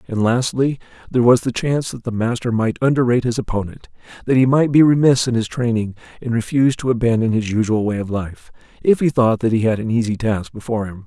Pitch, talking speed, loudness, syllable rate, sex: 120 Hz, 220 wpm, -18 LUFS, 6.2 syllables/s, male